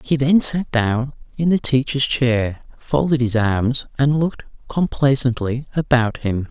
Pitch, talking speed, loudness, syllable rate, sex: 130 Hz, 150 wpm, -19 LUFS, 4.1 syllables/s, male